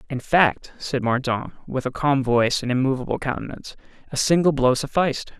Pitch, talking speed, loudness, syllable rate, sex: 135 Hz, 165 wpm, -22 LUFS, 5.6 syllables/s, male